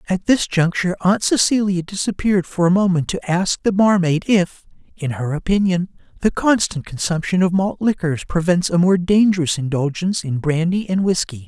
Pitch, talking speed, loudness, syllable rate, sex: 180 Hz, 165 wpm, -18 LUFS, 5.2 syllables/s, male